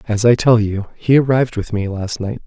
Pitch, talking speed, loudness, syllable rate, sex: 110 Hz, 245 wpm, -16 LUFS, 5.5 syllables/s, male